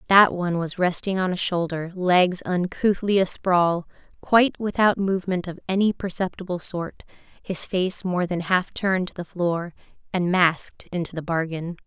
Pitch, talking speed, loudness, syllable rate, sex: 180 Hz, 160 wpm, -23 LUFS, 4.8 syllables/s, female